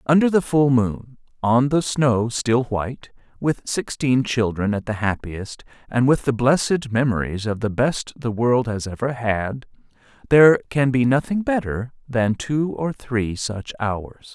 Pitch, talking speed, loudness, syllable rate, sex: 125 Hz, 165 wpm, -21 LUFS, 4.1 syllables/s, male